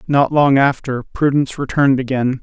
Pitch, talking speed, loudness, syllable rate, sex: 135 Hz, 150 wpm, -16 LUFS, 5.2 syllables/s, male